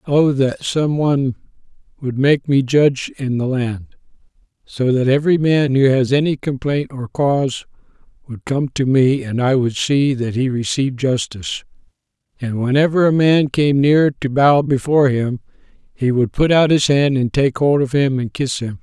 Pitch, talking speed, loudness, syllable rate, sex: 135 Hz, 180 wpm, -17 LUFS, 4.6 syllables/s, male